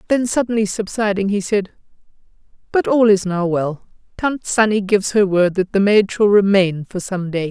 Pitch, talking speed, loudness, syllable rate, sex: 200 Hz, 185 wpm, -17 LUFS, 4.9 syllables/s, female